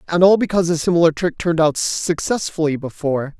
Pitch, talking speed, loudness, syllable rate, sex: 165 Hz, 175 wpm, -18 LUFS, 6.2 syllables/s, male